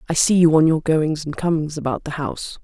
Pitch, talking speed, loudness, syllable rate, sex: 155 Hz, 250 wpm, -19 LUFS, 5.7 syllables/s, female